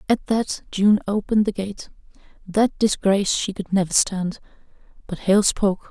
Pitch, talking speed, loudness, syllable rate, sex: 200 Hz, 130 wpm, -21 LUFS, 4.8 syllables/s, female